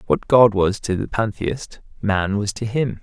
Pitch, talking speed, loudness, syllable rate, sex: 105 Hz, 200 wpm, -20 LUFS, 4.1 syllables/s, male